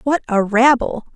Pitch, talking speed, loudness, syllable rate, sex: 240 Hz, 155 wpm, -16 LUFS, 4.3 syllables/s, female